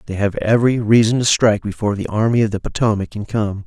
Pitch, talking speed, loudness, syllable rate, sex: 105 Hz, 230 wpm, -17 LUFS, 6.6 syllables/s, male